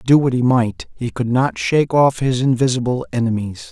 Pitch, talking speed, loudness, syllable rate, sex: 125 Hz, 195 wpm, -17 LUFS, 5.1 syllables/s, male